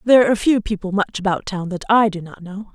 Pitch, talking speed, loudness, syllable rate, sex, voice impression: 200 Hz, 260 wpm, -18 LUFS, 6.2 syllables/s, female, feminine, adult-like, tensed, powerful, bright, clear, fluent, friendly, unique, intense, slightly sharp, light